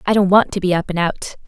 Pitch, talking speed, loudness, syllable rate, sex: 185 Hz, 325 wpm, -16 LUFS, 7.6 syllables/s, female